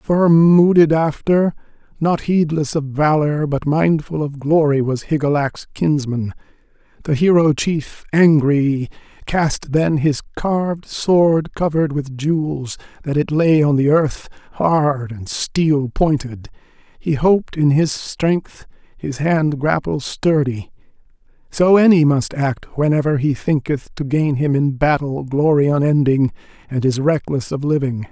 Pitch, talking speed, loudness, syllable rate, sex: 150 Hz, 135 wpm, -17 LUFS, 3.9 syllables/s, male